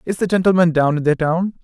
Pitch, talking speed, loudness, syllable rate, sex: 170 Hz, 255 wpm, -17 LUFS, 6.1 syllables/s, male